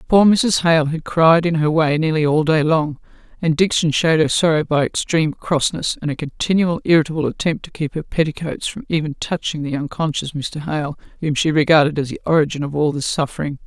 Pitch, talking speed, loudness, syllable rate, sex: 155 Hz, 200 wpm, -18 LUFS, 5.6 syllables/s, female